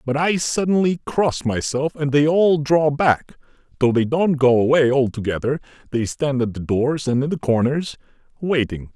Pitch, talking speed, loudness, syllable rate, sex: 140 Hz, 175 wpm, -19 LUFS, 4.6 syllables/s, male